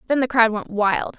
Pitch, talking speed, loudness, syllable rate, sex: 230 Hz, 255 wpm, -19 LUFS, 5.0 syllables/s, female